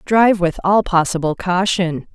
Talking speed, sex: 140 wpm, female